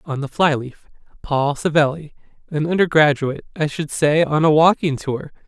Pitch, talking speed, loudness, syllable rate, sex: 150 Hz, 155 wpm, -18 LUFS, 4.9 syllables/s, male